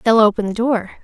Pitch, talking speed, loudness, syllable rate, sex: 220 Hz, 235 wpm, -17 LUFS, 5.6 syllables/s, female